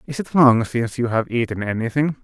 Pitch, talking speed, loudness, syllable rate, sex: 120 Hz, 215 wpm, -19 LUFS, 5.8 syllables/s, male